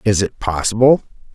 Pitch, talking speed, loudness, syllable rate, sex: 105 Hz, 135 wpm, -16 LUFS, 5.2 syllables/s, male